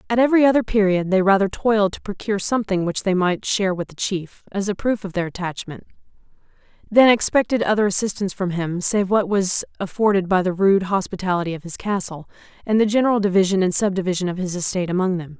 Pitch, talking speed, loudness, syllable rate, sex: 195 Hz, 200 wpm, -20 LUFS, 6.4 syllables/s, female